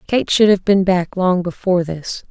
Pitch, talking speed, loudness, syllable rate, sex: 190 Hz, 210 wpm, -16 LUFS, 4.7 syllables/s, female